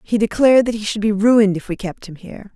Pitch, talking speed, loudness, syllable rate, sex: 210 Hz, 280 wpm, -16 LUFS, 6.5 syllables/s, female